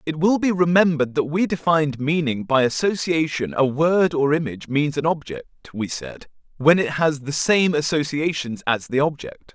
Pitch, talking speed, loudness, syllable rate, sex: 150 Hz, 175 wpm, -20 LUFS, 4.9 syllables/s, male